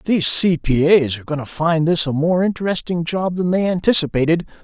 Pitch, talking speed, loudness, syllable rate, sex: 165 Hz, 205 wpm, -18 LUFS, 5.8 syllables/s, male